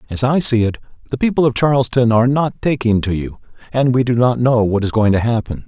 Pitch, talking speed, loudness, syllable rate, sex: 120 Hz, 245 wpm, -16 LUFS, 6.0 syllables/s, male